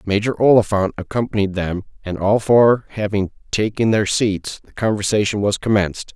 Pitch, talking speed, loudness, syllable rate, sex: 105 Hz, 145 wpm, -18 LUFS, 5.1 syllables/s, male